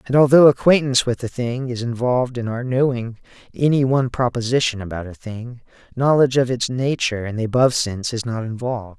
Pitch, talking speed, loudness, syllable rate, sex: 125 Hz, 185 wpm, -19 LUFS, 6.1 syllables/s, male